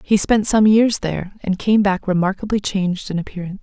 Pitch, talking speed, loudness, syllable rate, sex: 200 Hz, 200 wpm, -18 LUFS, 5.8 syllables/s, female